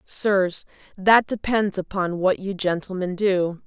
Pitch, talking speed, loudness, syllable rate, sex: 190 Hz, 130 wpm, -22 LUFS, 3.7 syllables/s, female